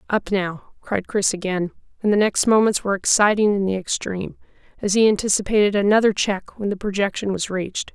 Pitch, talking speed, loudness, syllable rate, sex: 200 Hz, 180 wpm, -20 LUFS, 5.7 syllables/s, female